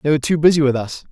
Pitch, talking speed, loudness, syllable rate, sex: 145 Hz, 325 wpm, -16 LUFS, 7.8 syllables/s, male